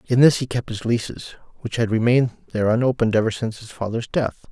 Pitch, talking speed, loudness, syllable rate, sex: 115 Hz, 215 wpm, -21 LUFS, 7.0 syllables/s, male